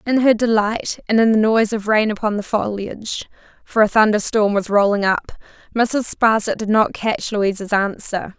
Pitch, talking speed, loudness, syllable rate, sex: 215 Hz, 185 wpm, -18 LUFS, 4.2 syllables/s, female